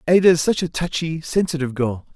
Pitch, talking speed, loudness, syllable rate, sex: 155 Hz, 195 wpm, -20 LUFS, 6.2 syllables/s, male